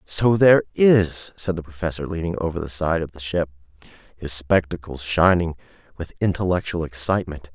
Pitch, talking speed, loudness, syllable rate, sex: 85 Hz, 150 wpm, -21 LUFS, 5.4 syllables/s, male